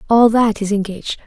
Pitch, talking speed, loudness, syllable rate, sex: 215 Hz, 190 wpm, -16 LUFS, 5.8 syllables/s, female